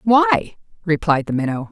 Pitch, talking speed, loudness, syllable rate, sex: 180 Hz, 140 wpm, -18 LUFS, 4.4 syllables/s, female